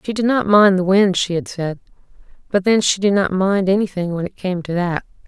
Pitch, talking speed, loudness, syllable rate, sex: 190 Hz, 240 wpm, -17 LUFS, 5.4 syllables/s, female